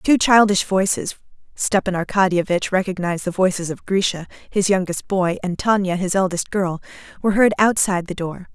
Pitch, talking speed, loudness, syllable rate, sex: 190 Hz, 160 wpm, -19 LUFS, 3.8 syllables/s, female